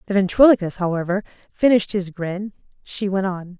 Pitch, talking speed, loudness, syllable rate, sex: 195 Hz, 150 wpm, -20 LUFS, 5.7 syllables/s, female